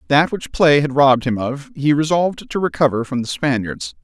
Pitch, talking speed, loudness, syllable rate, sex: 135 Hz, 210 wpm, -17 LUFS, 5.5 syllables/s, male